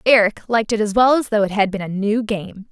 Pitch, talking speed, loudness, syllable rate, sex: 215 Hz, 290 wpm, -18 LUFS, 5.9 syllables/s, female